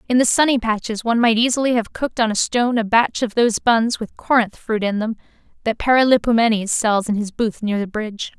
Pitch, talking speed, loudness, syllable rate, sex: 225 Hz, 220 wpm, -18 LUFS, 6.0 syllables/s, female